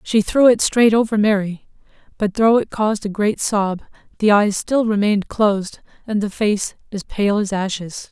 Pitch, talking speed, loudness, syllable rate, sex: 210 Hz, 185 wpm, -18 LUFS, 4.8 syllables/s, female